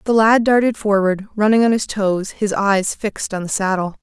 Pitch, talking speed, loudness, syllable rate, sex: 205 Hz, 210 wpm, -17 LUFS, 5.0 syllables/s, female